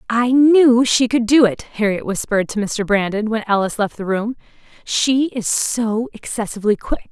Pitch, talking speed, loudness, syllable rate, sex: 225 Hz, 175 wpm, -17 LUFS, 4.9 syllables/s, female